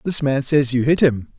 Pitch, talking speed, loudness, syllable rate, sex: 135 Hz, 260 wpm, -18 LUFS, 4.9 syllables/s, male